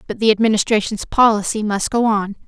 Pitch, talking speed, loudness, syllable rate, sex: 215 Hz, 170 wpm, -17 LUFS, 5.8 syllables/s, female